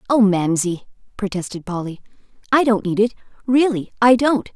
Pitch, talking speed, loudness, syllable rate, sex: 215 Hz, 145 wpm, -18 LUFS, 5.1 syllables/s, female